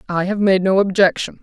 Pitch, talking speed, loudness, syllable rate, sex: 190 Hz, 210 wpm, -16 LUFS, 5.6 syllables/s, female